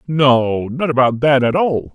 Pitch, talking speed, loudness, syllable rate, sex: 135 Hz, 185 wpm, -15 LUFS, 3.9 syllables/s, male